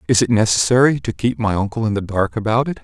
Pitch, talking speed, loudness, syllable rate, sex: 110 Hz, 255 wpm, -17 LUFS, 6.4 syllables/s, male